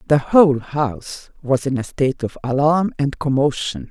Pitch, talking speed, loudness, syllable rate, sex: 140 Hz, 170 wpm, -18 LUFS, 4.8 syllables/s, female